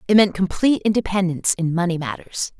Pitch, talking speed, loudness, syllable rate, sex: 185 Hz, 160 wpm, -20 LUFS, 6.4 syllables/s, female